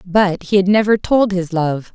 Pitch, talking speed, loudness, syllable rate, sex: 190 Hz, 215 wpm, -16 LUFS, 4.3 syllables/s, female